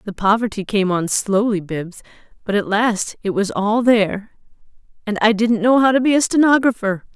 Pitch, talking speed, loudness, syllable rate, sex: 215 Hz, 175 wpm, -17 LUFS, 5.0 syllables/s, female